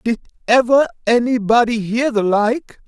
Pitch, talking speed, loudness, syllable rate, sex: 235 Hz, 125 wpm, -16 LUFS, 4.3 syllables/s, male